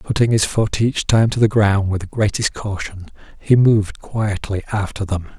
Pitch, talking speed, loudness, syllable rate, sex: 105 Hz, 190 wpm, -18 LUFS, 4.7 syllables/s, male